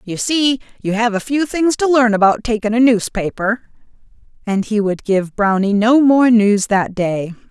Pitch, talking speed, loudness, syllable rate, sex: 225 Hz, 185 wpm, -15 LUFS, 4.5 syllables/s, female